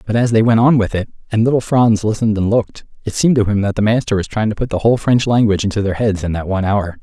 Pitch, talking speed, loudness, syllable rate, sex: 110 Hz, 300 wpm, -15 LUFS, 7.1 syllables/s, male